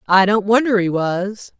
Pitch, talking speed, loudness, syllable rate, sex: 200 Hz, 190 wpm, -16 LUFS, 4.3 syllables/s, female